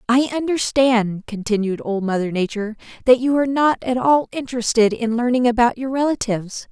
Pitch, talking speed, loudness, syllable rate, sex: 240 Hz, 160 wpm, -19 LUFS, 5.5 syllables/s, female